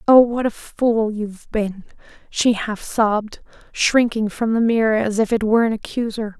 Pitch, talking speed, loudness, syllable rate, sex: 220 Hz, 180 wpm, -19 LUFS, 4.8 syllables/s, female